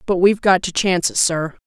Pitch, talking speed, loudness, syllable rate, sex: 185 Hz, 250 wpm, -17 LUFS, 6.1 syllables/s, female